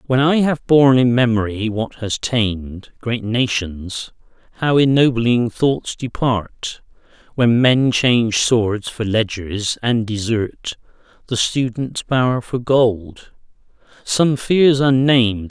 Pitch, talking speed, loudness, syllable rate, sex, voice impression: 120 Hz, 115 wpm, -17 LUFS, 3.6 syllables/s, male, masculine, middle-aged, slightly thick, sincere, calm, mature